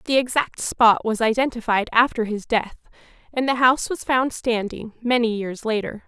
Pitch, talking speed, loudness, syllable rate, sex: 230 Hz, 170 wpm, -21 LUFS, 5.0 syllables/s, female